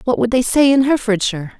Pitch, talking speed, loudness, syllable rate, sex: 240 Hz, 225 wpm, -15 LUFS, 6.9 syllables/s, female